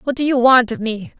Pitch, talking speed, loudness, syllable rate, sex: 245 Hz, 300 wpm, -15 LUFS, 5.3 syllables/s, female